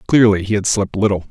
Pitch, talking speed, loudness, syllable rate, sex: 100 Hz, 230 wpm, -16 LUFS, 6.3 syllables/s, male